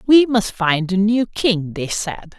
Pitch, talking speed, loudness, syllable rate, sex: 205 Hz, 200 wpm, -18 LUFS, 3.6 syllables/s, female